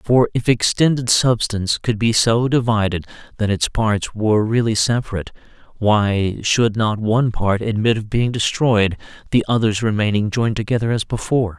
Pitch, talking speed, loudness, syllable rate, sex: 110 Hz, 155 wpm, -18 LUFS, 5.1 syllables/s, male